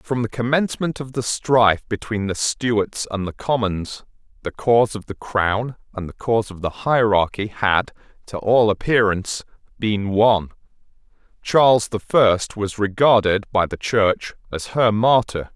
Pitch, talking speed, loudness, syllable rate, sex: 110 Hz, 155 wpm, -20 LUFS, 4.4 syllables/s, male